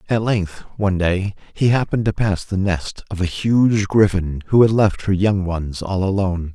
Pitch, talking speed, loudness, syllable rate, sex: 100 Hz, 200 wpm, -19 LUFS, 4.8 syllables/s, male